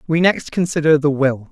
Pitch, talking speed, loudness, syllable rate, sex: 150 Hz, 200 wpm, -17 LUFS, 5.2 syllables/s, male